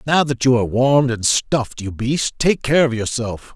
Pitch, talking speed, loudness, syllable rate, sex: 125 Hz, 220 wpm, -18 LUFS, 5.0 syllables/s, male